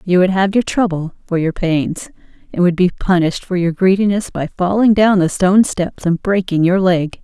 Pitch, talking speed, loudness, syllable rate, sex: 180 Hz, 205 wpm, -15 LUFS, 5.1 syllables/s, female